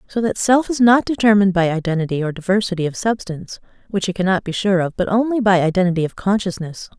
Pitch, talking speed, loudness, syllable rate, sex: 195 Hz, 205 wpm, -18 LUFS, 6.5 syllables/s, female